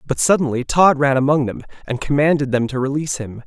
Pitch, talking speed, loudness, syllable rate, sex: 140 Hz, 210 wpm, -18 LUFS, 6.3 syllables/s, male